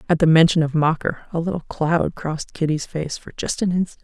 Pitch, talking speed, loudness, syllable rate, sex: 165 Hz, 225 wpm, -21 LUFS, 5.7 syllables/s, female